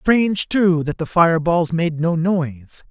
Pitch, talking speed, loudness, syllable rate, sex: 170 Hz, 165 wpm, -18 LUFS, 4.3 syllables/s, male